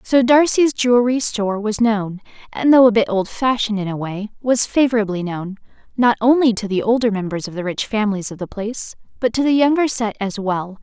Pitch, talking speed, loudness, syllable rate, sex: 220 Hz, 205 wpm, -18 LUFS, 5.6 syllables/s, female